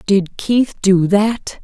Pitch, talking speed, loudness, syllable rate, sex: 200 Hz, 110 wpm, -15 LUFS, 2.7 syllables/s, female